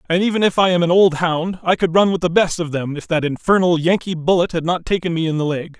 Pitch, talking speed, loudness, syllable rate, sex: 170 Hz, 290 wpm, -17 LUFS, 6.1 syllables/s, male